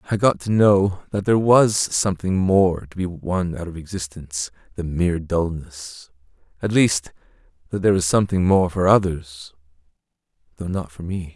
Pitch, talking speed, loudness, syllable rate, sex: 90 Hz, 165 wpm, -20 LUFS, 5.0 syllables/s, male